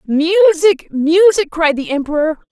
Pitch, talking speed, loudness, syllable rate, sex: 330 Hz, 120 wpm, -13 LUFS, 3.9 syllables/s, female